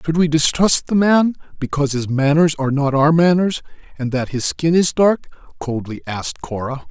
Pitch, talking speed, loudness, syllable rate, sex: 150 Hz, 185 wpm, -17 LUFS, 4.9 syllables/s, male